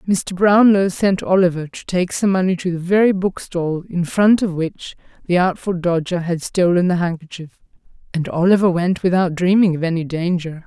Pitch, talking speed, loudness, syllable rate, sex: 180 Hz, 180 wpm, -17 LUFS, 5.0 syllables/s, female